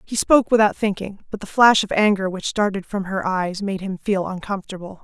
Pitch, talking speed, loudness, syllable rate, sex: 200 Hz, 215 wpm, -20 LUFS, 5.6 syllables/s, female